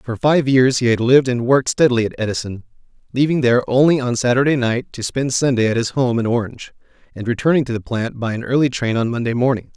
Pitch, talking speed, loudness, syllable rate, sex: 125 Hz, 225 wpm, -17 LUFS, 6.4 syllables/s, male